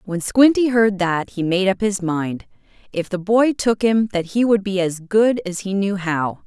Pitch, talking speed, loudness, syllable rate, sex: 200 Hz, 225 wpm, -19 LUFS, 4.3 syllables/s, female